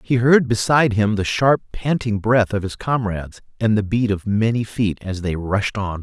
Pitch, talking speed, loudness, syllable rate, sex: 110 Hz, 210 wpm, -19 LUFS, 4.8 syllables/s, male